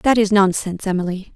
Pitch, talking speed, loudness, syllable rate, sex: 195 Hz, 175 wpm, -18 LUFS, 6.1 syllables/s, female